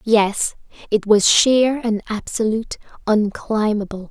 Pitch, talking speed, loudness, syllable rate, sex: 215 Hz, 100 wpm, -18 LUFS, 4.2 syllables/s, female